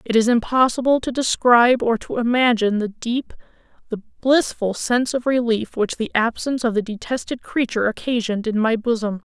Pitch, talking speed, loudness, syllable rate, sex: 235 Hz, 165 wpm, -20 LUFS, 5.6 syllables/s, female